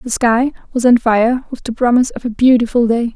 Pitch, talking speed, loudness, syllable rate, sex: 240 Hz, 230 wpm, -14 LUFS, 5.6 syllables/s, female